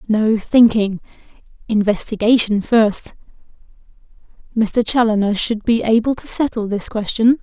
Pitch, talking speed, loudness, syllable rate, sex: 220 Hz, 105 wpm, -16 LUFS, 4.4 syllables/s, female